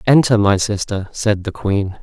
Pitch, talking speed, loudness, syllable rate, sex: 105 Hz, 180 wpm, -17 LUFS, 4.3 syllables/s, male